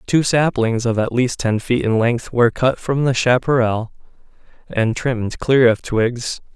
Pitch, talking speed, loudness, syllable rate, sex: 120 Hz, 175 wpm, -18 LUFS, 4.3 syllables/s, male